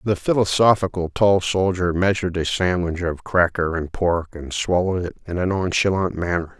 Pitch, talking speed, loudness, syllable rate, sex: 90 Hz, 165 wpm, -21 LUFS, 5.1 syllables/s, male